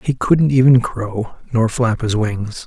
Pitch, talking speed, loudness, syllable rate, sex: 115 Hz, 180 wpm, -17 LUFS, 3.7 syllables/s, male